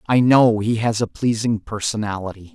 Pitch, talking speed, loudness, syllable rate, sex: 110 Hz, 165 wpm, -19 LUFS, 4.9 syllables/s, male